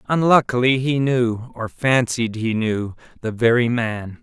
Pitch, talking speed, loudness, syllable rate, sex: 120 Hz, 140 wpm, -19 LUFS, 3.9 syllables/s, male